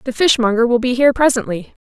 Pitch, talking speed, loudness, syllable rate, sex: 245 Hz, 190 wpm, -15 LUFS, 6.6 syllables/s, female